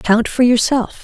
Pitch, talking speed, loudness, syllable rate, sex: 240 Hz, 175 wpm, -14 LUFS, 4.1 syllables/s, female